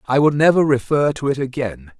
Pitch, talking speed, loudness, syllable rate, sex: 135 Hz, 210 wpm, -18 LUFS, 5.6 syllables/s, male